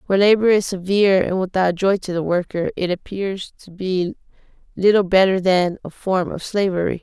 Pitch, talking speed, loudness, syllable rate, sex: 190 Hz, 180 wpm, -19 LUFS, 5.3 syllables/s, female